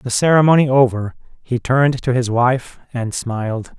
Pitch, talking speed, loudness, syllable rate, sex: 125 Hz, 160 wpm, -17 LUFS, 4.8 syllables/s, male